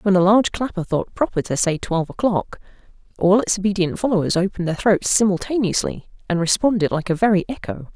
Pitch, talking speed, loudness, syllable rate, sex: 195 Hz, 180 wpm, -20 LUFS, 6.1 syllables/s, female